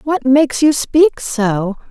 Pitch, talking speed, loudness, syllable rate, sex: 265 Hz, 155 wpm, -14 LUFS, 3.5 syllables/s, female